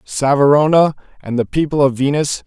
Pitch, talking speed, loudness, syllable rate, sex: 135 Hz, 145 wpm, -15 LUFS, 5.1 syllables/s, male